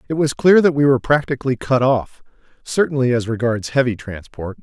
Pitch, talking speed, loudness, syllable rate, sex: 130 Hz, 180 wpm, -17 LUFS, 5.7 syllables/s, male